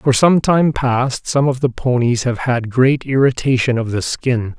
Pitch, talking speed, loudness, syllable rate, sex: 130 Hz, 195 wpm, -16 LUFS, 4.2 syllables/s, male